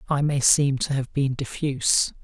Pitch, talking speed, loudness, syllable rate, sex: 135 Hz, 190 wpm, -22 LUFS, 4.6 syllables/s, male